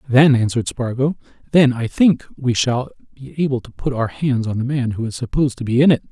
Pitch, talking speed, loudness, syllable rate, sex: 130 Hz, 235 wpm, -18 LUFS, 5.9 syllables/s, male